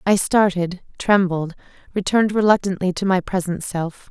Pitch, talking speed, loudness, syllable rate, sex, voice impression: 190 Hz, 130 wpm, -20 LUFS, 4.9 syllables/s, female, feminine, adult-like, fluent, sincere, slightly friendly